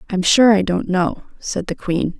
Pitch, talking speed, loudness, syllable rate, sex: 190 Hz, 220 wpm, -17 LUFS, 4.2 syllables/s, female